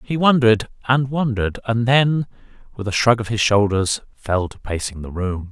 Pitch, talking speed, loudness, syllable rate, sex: 115 Hz, 185 wpm, -19 LUFS, 5.0 syllables/s, male